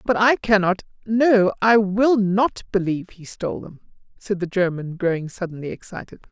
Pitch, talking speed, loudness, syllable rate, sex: 195 Hz, 145 wpm, -20 LUFS, 5.1 syllables/s, female